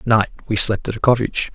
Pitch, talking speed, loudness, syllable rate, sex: 110 Hz, 270 wpm, -18 LUFS, 6.7 syllables/s, male